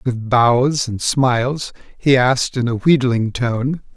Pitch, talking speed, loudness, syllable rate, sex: 125 Hz, 150 wpm, -17 LUFS, 3.7 syllables/s, male